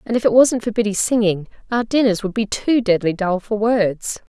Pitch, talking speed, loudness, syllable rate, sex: 215 Hz, 220 wpm, -18 LUFS, 5.1 syllables/s, female